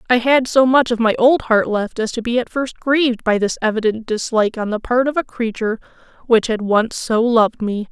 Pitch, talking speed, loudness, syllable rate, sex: 235 Hz, 235 wpm, -17 LUFS, 5.5 syllables/s, female